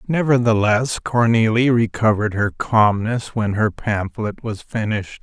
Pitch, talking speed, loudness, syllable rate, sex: 110 Hz, 115 wpm, -19 LUFS, 4.4 syllables/s, male